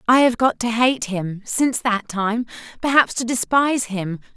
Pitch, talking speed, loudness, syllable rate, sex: 230 Hz, 165 wpm, -20 LUFS, 4.6 syllables/s, female